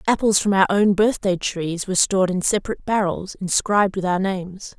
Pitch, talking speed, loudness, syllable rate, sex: 190 Hz, 200 wpm, -20 LUFS, 5.9 syllables/s, female